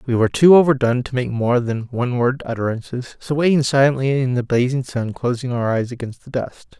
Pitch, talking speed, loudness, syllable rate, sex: 125 Hz, 210 wpm, -18 LUFS, 6.0 syllables/s, male